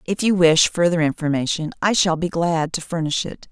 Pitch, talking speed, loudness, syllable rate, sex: 165 Hz, 205 wpm, -19 LUFS, 5.2 syllables/s, female